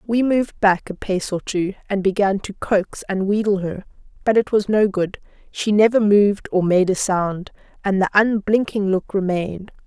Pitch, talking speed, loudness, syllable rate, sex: 200 Hz, 190 wpm, -19 LUFS, 4.7 syllables/s, female